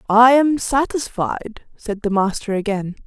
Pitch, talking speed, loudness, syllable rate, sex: 230 Hz, 135 wpm, -18 LUFS, 4.1 syllables/s, female